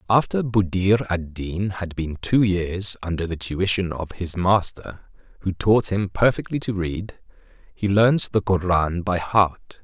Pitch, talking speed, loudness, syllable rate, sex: 95 Hz, 160 wpm, -22 LUFS, 4.0 syllables/s, male